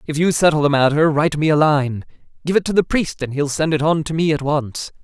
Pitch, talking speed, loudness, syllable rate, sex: 150 Hz, 275 wpm, -17 LUFS, 5.9 syllables/s, male